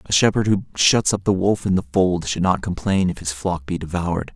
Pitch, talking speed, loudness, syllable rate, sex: 90 Hz, 250 wpm, -20 LUFS, 5.3 syllables/s, male